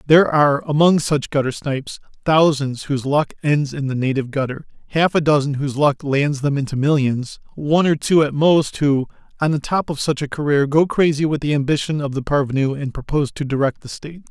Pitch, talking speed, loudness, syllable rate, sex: 145 Hz, 210 wpm, -18 LUFS, 5.9 syllables/s, male